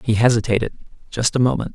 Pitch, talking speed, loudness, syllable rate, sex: 115 Hz, 170 wpm, -19 LUFS, 6.4 syllables/s, male